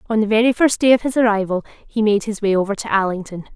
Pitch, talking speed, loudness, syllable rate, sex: 215 Hz, 255 wpm, -18 LUFS, 6.4 syllables/s, female